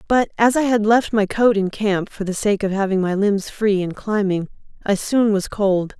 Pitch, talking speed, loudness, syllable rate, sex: 205 Hz, 230 wpm, -19 LUFS, 4.7 syllables/s, female